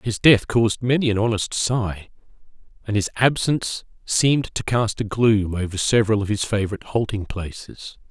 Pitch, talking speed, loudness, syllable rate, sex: 110 Hz, 165 wpm, -21 LUFS, 5.2 syllables/s, male